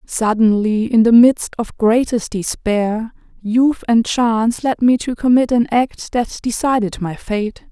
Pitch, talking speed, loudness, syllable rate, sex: 230 Hz, 155 wpm, -16 LUFS, 3.9 syllables/s, female